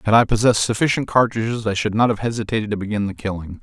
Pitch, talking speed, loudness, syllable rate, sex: 110 Hz, 230 wpm, -19 LUFS, 7.2 syllables/s, male